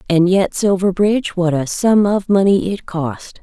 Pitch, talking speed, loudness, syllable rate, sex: 185 Hz, 175 wpm, -16 LUFS, 4.3 syllables/s, female